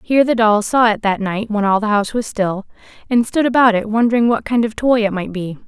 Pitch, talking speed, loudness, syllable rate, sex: 220 Hz, 265 wpm, -16 LUFS, 5.9 syllables/s, female